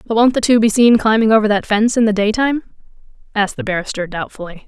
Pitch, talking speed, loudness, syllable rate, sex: 220 Hz, 220 wpm, -15 LUFS, 6.9 syllables/s, female